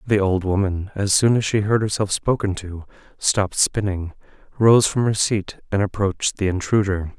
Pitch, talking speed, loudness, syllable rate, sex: 100 Hz, 175 wpm, -20 LUFS, 4.9 syllables/s, male